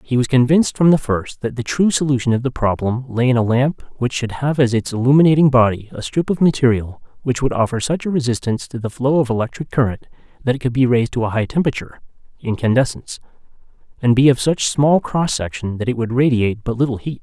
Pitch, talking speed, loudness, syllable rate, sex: 125 Hz, 215 wpm, -17 LUFS, 6.3 syllables/s, male